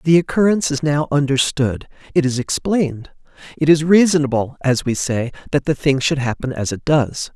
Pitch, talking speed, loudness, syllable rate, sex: 145 Hz, 180 wpm, -18 LUFS, 5.3 syllables/s, male